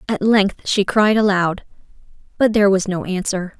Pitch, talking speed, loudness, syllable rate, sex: 200 Hz, 165 wpm, -17 LUFS, 4.8 syllables/s, female